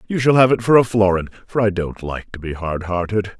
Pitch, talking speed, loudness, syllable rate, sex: 100 Hz, 265 wpm, -18 LUFS, 5.5 syllables/s, male